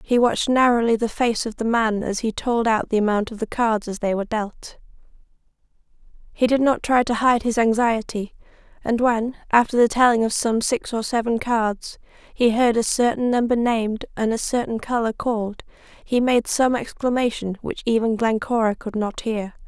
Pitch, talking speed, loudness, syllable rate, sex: 230 Hz, 185 wpm, -21 LUFS, 5.0 syllables/s, female